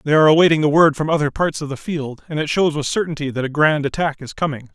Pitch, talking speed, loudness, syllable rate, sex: 150 Hz, 280 wpm, -18 LUFS, 6.6 syllables/s, male